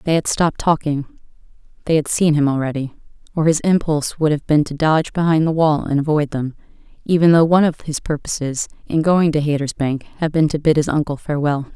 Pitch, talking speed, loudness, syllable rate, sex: 155 Hz, 205 wpm, -18 LUFS, 5.9 syllables/s, female